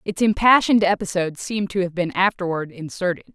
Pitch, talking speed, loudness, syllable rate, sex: 190 Hz, 160 wpm, -20 LUFS, 6.0 syllables/s, female